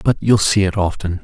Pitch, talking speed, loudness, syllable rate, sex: 95 Hz, 245 wpm, -16 LUFS, 5.5 syllables/s, male